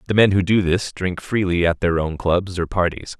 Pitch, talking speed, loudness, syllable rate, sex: 90 Hz, 245 wpm, -20 LUFS, 5.0 syllables/s, male